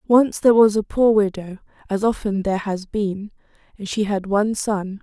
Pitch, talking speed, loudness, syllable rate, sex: 205 Hz, 190 wpm, -20 LUFS, 5.1 syllables/s, female